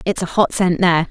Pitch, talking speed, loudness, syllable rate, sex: 180 Hz, 270 wpm, -17 LUFS, 6.1 syllables/s, female